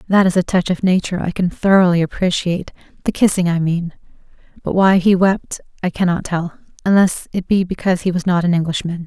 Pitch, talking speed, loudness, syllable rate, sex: 180 Hz, 190 wpm, -17 LUFS, 6.0 syllables/s, female